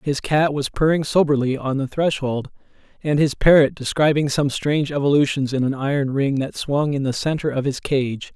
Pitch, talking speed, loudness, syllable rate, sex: 140 Hz, 195 wpm, -20 LUFS, 5.2 syllables/s, male